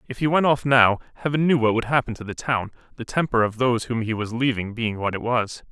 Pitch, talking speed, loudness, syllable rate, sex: 120 Hz, 260 wpm, -22 LUFS, 6.0 syllables/s, male